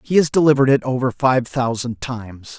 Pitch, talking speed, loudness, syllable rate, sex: 130 Hz, 185 wpm, -18 LUFS, 5.6 syllables/s, male